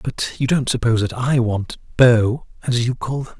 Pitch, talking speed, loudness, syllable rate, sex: 120 Hz, 210 wpm, -19 LUFS, 4.9 syllables/s, male